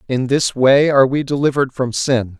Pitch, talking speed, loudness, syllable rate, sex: 135 Hz, 200 wpm, -15 LUFS, 5.4 syllables/s, male